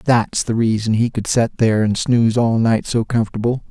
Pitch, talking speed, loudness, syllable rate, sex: 115 Hz, 210 wpm, -17 LUFS, 5.4 syllables/s, male